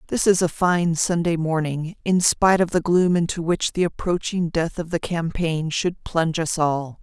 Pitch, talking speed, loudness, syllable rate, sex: 170 Hz, 195 wpm, -21 LUFS, 4.6 syllables/s, female